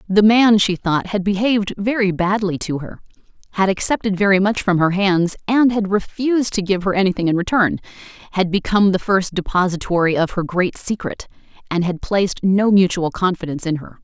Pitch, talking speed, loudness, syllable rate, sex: 190 Hz, 180 wpm, -18 LUFS, 5.5 syllables/s, female